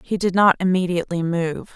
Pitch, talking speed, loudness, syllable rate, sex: 180 Hz, 170 wpm, -20 LUFS, 5.6 syllables/s, female